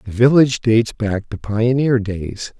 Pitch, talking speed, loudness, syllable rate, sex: 110 Hz, 160 wpm, -17 LUFS, 4.5 syllables/s, male